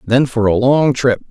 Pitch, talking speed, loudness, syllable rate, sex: 125 Hz, 230 wpm, -14 LUFS, 4.4 syllables/s, male